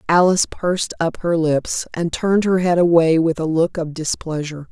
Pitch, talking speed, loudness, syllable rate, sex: 165 Hz, 190 wpm, -18 LUFS, 5.2 syllables/s, female